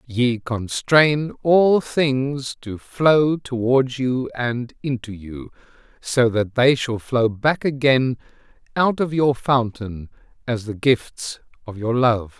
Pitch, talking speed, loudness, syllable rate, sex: 125 Hz, 135 wpm, -20 LUFS, 3.2 syllables/s, male